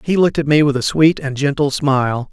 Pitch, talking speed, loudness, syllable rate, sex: 145 Hz, 260 wpm, -15 LUFS, 5.9 syllables/s, male